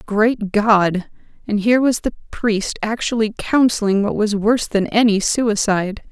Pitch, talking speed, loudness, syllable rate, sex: 215 Hz, 135 wpm, -18 LUFS, 4.5 syllables/s, female